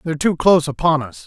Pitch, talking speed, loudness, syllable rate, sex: 155 Hz, 235 wpm, -17 LUFS, 7.0 syllables/s, male